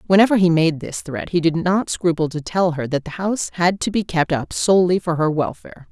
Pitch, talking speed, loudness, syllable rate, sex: 170 Hz, 245 wpm, -19 LUFS, 5.6 syllables/s, female